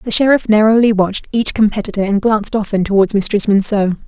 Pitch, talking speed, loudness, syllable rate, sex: 210 Hz, 175 wpm, -14 LUFS, 6.2 syllables/s, female